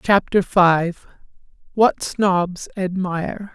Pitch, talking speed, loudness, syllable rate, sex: 185 Hz, 70 wpm, -19 LUFS, 3.0 syllables/s, male